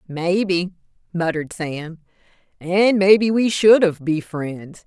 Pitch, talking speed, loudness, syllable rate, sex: 180 Hz, 125 wpm, -18 LUFS, 3.8 syllables/s, female